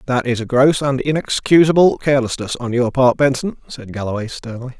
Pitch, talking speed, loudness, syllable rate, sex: 130 Hz, 165 wpm, -16 LUFS, 5.3 syllables/s, male